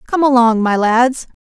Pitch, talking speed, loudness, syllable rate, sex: 245 Hz, 170 wpm, -13 LUFS, 4.4 syllables/s, female